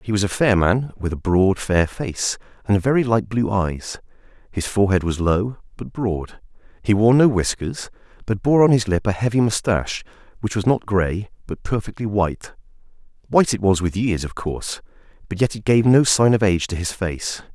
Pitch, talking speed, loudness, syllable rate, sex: 105 Hz, 195 wpm, -20 LUFS, 5.2 syllables/s, male